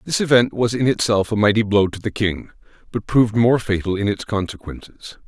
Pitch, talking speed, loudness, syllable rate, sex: 105 Hz, 205 wpm, -19 LUFS, 5.5 syllables/s, male